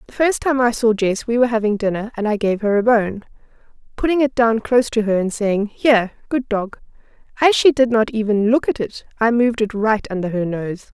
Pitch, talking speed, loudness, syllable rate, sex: 225 Hz, 230 wpm, -18 LUFS, 5.8 syllables/s, female